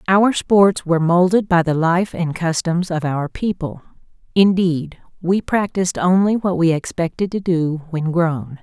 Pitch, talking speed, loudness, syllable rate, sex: 175 Hz, 160 wpm, -18 LUFS, 4.3 syllables/s, female